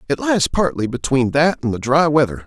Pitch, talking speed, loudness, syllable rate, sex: 145 Hz, 220 wpm, -17 LUFS, 5.2 syllables/s, male